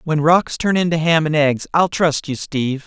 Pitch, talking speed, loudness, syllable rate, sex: 155 Hz, 230 wpm, -17 LUFS, 4.8 syllables/s, male